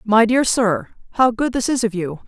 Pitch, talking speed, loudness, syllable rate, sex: 230 Hz, 240 wpm, -18 LUFS, 4.8 syllables/s, female